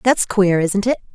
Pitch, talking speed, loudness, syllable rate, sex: 200 Hz, 210 wpm, -17 LUFS, 4.4 syllables/s, female